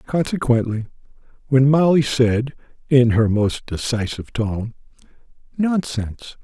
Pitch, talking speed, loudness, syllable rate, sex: 125 Hz, 95 wpm, -19 LUFS, 4.3 syllables/s, male